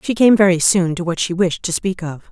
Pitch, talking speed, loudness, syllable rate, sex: 180 Hz, 285 wpm, -16 LUFS, 5.5 syllables/s, female